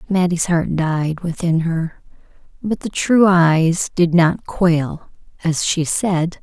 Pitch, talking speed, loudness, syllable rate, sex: 170 Hz, 140 wpm, -17 LUFS, 3.2 syllables/s, female